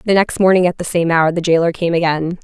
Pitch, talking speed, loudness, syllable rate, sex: 170 Hz, 270 wpm, -15 LUFS, 6.2 syllables/s, female